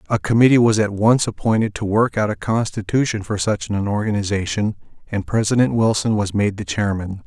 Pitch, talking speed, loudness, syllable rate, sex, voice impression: 105 Hz, 180 wpm, -19 LUFS, 5.5 syllables/s, male, very masculine, very adult-like, middle-aged, very thick, slightly tensed, slightly powerful, slightly dark, soft, muffled, fluent, very cool, very intellectual, sincere, very calm, very mature, friendly, reassuring, slightly unique, slightly elegant, wild, sweet, slightly lively, very kind